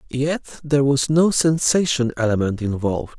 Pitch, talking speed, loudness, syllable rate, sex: 135 Hz, 130 wpm, -19 LUFS, 4.9 syllables/s, male